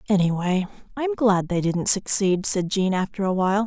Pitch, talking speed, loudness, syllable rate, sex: 195 Hz, 180 wpm, -22 LUFS, 5.0 syllables/s, female